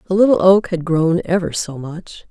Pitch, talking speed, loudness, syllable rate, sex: 175 Hz, 210 wpm, -16 LUFS, 4.8 syllables/s, female